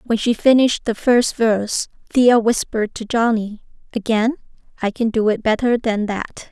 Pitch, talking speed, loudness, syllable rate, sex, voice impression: 225 Hz, 165 wpm, -18 LUFS, 4.8 syllables/s, female, very feminine, slightly young, adult-like, very thin, tensed, slightly weak, bright, hard, very clear, fluent, cute, intellectual, refreshing, sincere, calm, friendly, very reassuring, unique, elegant, very sweet, slightly lively, slightly kind, sharp, slightly modest